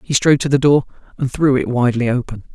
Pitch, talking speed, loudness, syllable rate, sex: 130 Hz, 210 wpm, -16 LUFS, 6.9 syllables/s, male